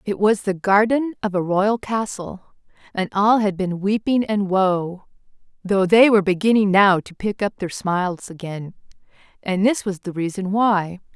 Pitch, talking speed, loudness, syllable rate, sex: 200 Hz, 170 wpm, -19 LUFS, 3.2 syllables/s, female